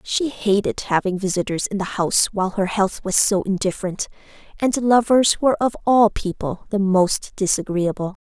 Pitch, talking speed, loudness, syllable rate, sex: 200 Hz, 160 wpm, -20 LUFS, 5.1 syllables/s, female